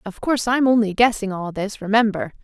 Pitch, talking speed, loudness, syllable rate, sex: 215 Hz, 195 wpm, -19 LUFS, 5.8 syllables/s, female